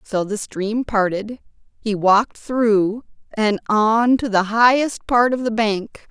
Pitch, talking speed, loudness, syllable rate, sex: 220 Hz, 155 wpm, -18 LUFS, 3.6 syllables/s, female